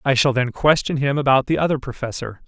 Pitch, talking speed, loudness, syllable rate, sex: 130 Hz, 220 wpm, -19 LUFS, 6.0 syllables/s, male